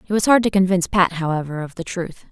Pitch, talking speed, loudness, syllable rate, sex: 180 Hz, 260 wpm, -19 LUFS, 6.4 syllables/s, female